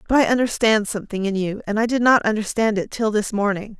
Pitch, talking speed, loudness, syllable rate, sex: 215 Hz, 235 wpm, -20 LUFS, 6.2 syllables/s, female